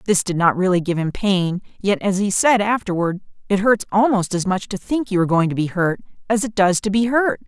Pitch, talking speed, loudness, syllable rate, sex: 195 Hz, 250 wpm, -19 LUFS, 5.6 syllables/s, female